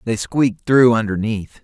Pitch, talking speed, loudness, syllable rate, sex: 115 Hz, 145 wpm, -17 LUFS, 4.6 syllables/s, male